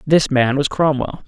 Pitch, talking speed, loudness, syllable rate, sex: 140 Hz, 190 wpm, -17 LUFS, 4.4 syllables/s, male